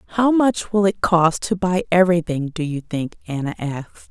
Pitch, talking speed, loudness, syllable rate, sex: 175 Hz, 190 wpm, -20 LUFS, 5.3 syllables/s, female